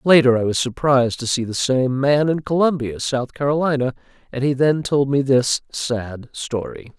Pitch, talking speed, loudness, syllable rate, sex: 135 Hz, 180 wpm, -19 LUFS, 4.7 syllables/s, male